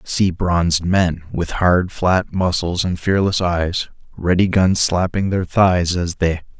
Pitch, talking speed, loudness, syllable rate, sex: 90 Hz, 155 wpm, -18 LUFS, 3.7 syllables/s, male